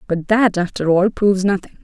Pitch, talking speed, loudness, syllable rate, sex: 190 Hz, 195 wpm, -17 LUFS, 5.5 syllables/s, female